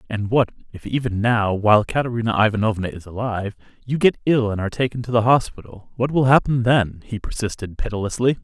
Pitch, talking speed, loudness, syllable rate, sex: 115 Hz, 185 wpm, -20 LUFS, 6.1 syllables/s, male